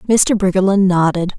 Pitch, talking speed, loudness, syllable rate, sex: 190 Hz, 130 wpm, -14 LUFS, 5.2 syllables/s, female